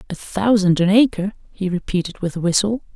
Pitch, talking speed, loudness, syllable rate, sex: 195 Hz, 185 wpm, -19 LUFS, 5.7 syllables/s, female